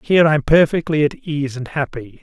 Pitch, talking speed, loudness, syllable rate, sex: 145 Hz, 190 wpm, -17 LUFS, 5.2 syllables/s, male